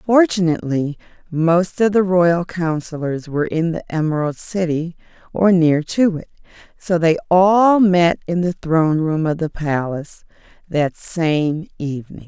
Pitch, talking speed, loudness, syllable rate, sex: 170 Hz, 140 wpm, -18 LUFS, 4.3 syllables/s, female